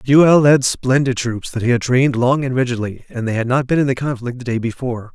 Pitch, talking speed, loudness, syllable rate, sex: 125 Hz, 255 wpm, -17 LUFS, 5.7 syllables/s, male